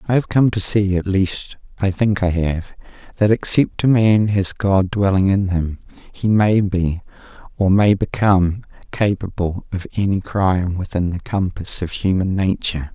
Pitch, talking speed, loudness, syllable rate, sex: 95 Hz, 160 wpm, -18 LUFS, 4.6 syllables/s, male